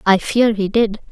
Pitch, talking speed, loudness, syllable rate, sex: 210 Hz, 215 wpm, -16 LUFS, 4.4 syllables/s, female